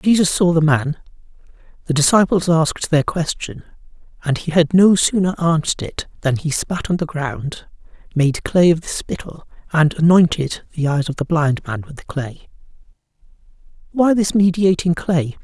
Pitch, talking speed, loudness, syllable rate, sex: 160 Hz, 160 wpm, -18 LUFS, 4.8 syllables/s, male